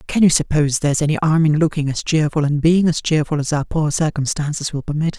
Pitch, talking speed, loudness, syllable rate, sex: 150 Hz, 230 wpm, -18 LUFS, 6.2 syllables/s, male